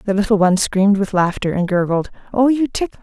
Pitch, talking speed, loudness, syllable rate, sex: 200 Hz, 220 wpm, -17 LUFS, 6.1 syllables/s, female